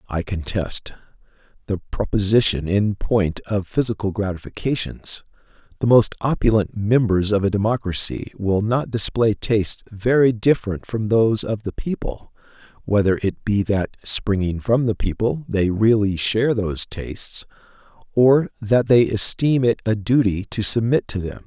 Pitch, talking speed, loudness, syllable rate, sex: 105 Hz, 145 wpm, -20 LUFS, 4.6 syllables/s, male